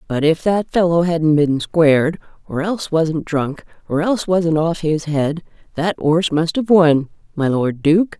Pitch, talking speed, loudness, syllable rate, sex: 165 Hz, 175 wpm, -17 LUFS, 4.2 syllables/s, female